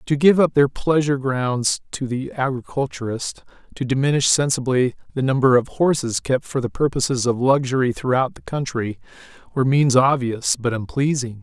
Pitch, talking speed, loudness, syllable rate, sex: 130 Hz, 160 wpm, -20 LUFS, 5.1 syllables/s, male